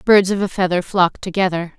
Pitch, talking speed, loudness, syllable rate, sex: 185 Hz, 200 wpm, -18 LUFS, 5.4 syllables/s, female